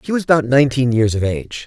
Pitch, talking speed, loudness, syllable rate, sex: 130 Hz, 255 wpm, -16 LUFS, 7.0 syllables/s, male